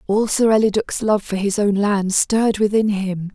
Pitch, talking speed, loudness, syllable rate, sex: 205 Hz, 195 wpm, -18 LUFS, 4.7 syllables/s, female